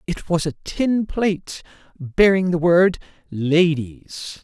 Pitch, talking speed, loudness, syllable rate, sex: 170 Hz, 120 wpm, -19 LUFS, 3.4 syllables/s, male